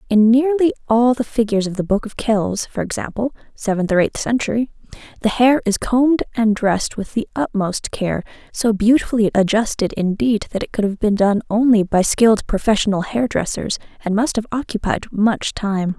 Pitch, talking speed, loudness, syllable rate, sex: 220 Hz, 175 wpm, -18 LUFS, 5.0 syllables/s, female